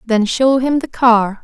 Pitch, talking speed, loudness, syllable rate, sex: 240 Hz, 210 wpm, -14 LUFS, 3.8 syllables/s, female